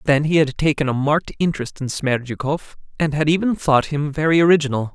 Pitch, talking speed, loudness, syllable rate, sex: 145 Hz, 195 wpm, -19 LUFS, 6.0 syllables/s, male